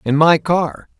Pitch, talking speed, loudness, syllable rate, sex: 150 Hz, 180 wpm, -16 LUFS, 3.7 syllables/s, male